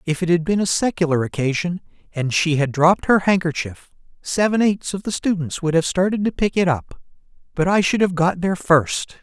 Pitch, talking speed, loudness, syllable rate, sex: 175 Hz, 200 wpm, -19 LUFS, 5.4 syllables/s, male